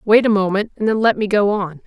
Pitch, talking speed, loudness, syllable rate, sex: 205 Hz, 290 wpm, -17 LUFS, 5.9 syllables/s, female